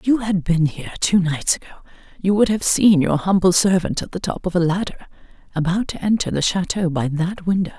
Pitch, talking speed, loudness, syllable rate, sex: 180 Hz, 225 wpm, -19 LUFS, 5.7 syllables/s, female